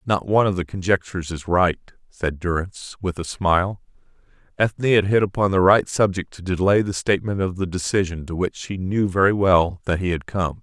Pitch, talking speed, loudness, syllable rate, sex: 95 Hz, 205 wpm, -21 LUFS, 5.5 syllables/s, male